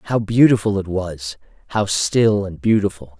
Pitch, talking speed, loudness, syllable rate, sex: 100 Hz, 150 wpm, -18 LUFS, 4.4 syllables/s, male